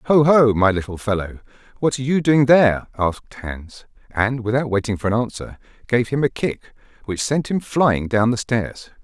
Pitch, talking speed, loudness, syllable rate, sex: 120 Hz, 195 wpm, -19 LUFS, 5.1 syllables/s, male